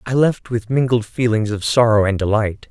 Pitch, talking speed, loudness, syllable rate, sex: 115 Hz, 200 wpm, -17 LUFS, 5.0 syllables/s, male